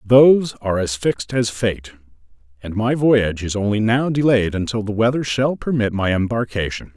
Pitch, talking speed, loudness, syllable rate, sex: 110 Hz, 170 wpm, -19 LUFS, 5.2 syllables/s, male